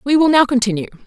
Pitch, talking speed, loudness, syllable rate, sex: 250 Hz, 225 wpm, -14 LUFS, 7.5 syllables/s, female